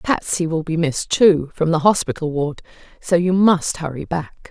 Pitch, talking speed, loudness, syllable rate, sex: 165 Hz, 185 wpm, -18 LUFS, 4.7 syllables/s, female